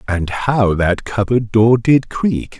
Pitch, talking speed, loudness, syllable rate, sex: 110 Hz, 160 wpm, -15 LUFS, 3.3 syllables/s, male